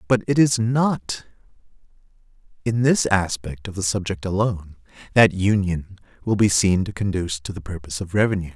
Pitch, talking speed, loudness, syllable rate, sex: 100 Hz, 160 wpm, -21 LUFS, 5.3 syllables/s, male